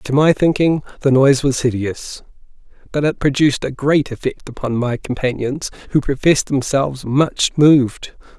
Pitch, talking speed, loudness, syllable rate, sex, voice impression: 135 Hz, 150 wpm, -17 LUFS, 5.0 syllables/s, male, masculine, middle-aged, slightly relaxed, powerful, slightly halting, raspy, slightly mature, friendly, slightly reassuring, wild, kind, modest